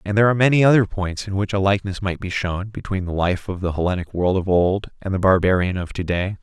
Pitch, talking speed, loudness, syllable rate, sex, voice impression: 95 Hz, 260 wpm, -20 LUFS, 6.3 syllables/s, male, masculine, adult-like, tensed, slightly bright, soft, clear, fluent, cool, intellectual, sincere, calm, friendly, reassuring, wild, kind